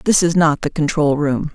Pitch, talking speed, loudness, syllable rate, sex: 155 Hz, 235 wpm, -16 LUFS, 4.6 syllables/s, female